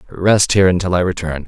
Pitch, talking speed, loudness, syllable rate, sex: 90 Hz, 205 wpm, -15 LUFS, 6.3 syllables/s, male